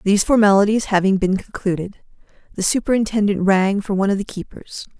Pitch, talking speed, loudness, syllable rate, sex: 200 Hz, 155 wpm, -18 LUFS, 6.1 syllables/s, female